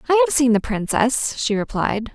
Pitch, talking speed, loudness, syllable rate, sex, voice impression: 220 Hz, 195 wpm, -19 LUFS, 4.8 syllables/s, female, very feminine, adult-like, slightly middle-aged, thin, slightly tensed, slightly weak, slightly dark, soft, slightly muffled, very fluent, slightly raspy, slightly cute, slightly cool, intellectual, refreshing, sincere, slightly calm, friendly, reassuring, elegant, sweet, kind, slightly intense, slightly sharp, slightly modest